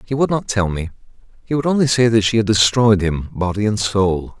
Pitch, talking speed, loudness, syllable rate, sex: 110 Hz, 230 wpm, -17 LUFS, 5.4 syllables/s, male